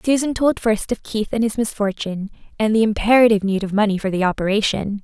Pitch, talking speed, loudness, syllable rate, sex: 215 Hz, 205 wpm, -19 LUFS, 6.3 syllables/s, female